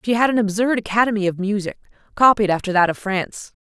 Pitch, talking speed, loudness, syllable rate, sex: 205 Hz, 200 wpm, -19 LUFS, 6.5 syllables/s, female